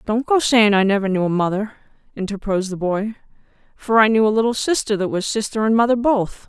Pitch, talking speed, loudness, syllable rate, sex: 215 Hz, 215 wpm, -18 LUFS, 6.0 syllables/s, female